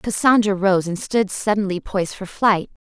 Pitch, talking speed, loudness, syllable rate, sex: 200 Hz, 165 wpm, -19 LUFS, 4.8 syllables/s, female